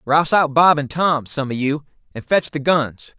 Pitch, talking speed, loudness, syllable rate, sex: 145 Hz, 225 wpm, -18 LUFS, 4.6 syllables/s, male